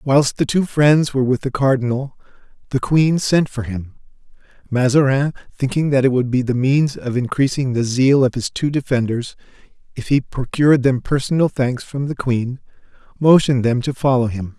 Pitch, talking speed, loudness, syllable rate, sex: 130 Hz, 175 wpm, -18 LUFS, 5.1 syllables/s, male